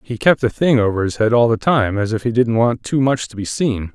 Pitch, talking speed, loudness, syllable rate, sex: 115 Hz, 305 wpm, -17 LUFS, 5.5 syllables/s, male